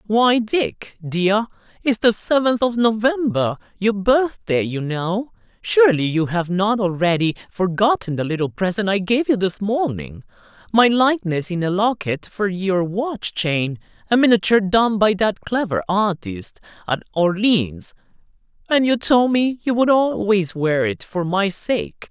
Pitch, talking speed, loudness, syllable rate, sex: 200 Hz, 150 wpm, -19 LUFS, 4.2 syllables/s, male